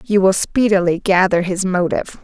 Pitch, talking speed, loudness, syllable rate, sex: 190 Hz, 160 wpm, -16 LUFS, 5.2 syllables/s, female